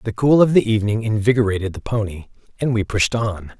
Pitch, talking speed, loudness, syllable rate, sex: 110 Hz, 200 wpm, -19 LUFS, 6.0 syllables/s, male